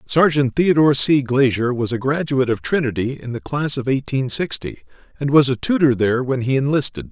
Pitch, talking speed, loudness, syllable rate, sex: 135 Hz, 195 wpm, -18 LUFS, 5.6 syllables/s, male